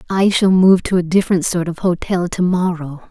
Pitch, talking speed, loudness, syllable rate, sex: 175 Hz, 215 wpm, -16 LUFS, 5.2 syllables/s, female